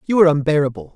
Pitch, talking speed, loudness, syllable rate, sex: 150 Hz, 190 wpm, -17 LUFS, 8.6 syllables/s, male